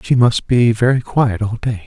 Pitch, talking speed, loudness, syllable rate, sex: 115 Hz, 225 wpm, -15 LUFS, 4.6 syllables/s, male